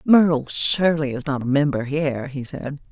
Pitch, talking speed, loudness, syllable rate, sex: 145 Hz, 185 wpm, -21 LUFS, 4.7 syllables/s, female